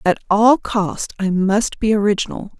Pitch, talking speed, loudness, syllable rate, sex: 205 Hz, 160 wpm, -17 LUFS, 4.4 syllables/s, female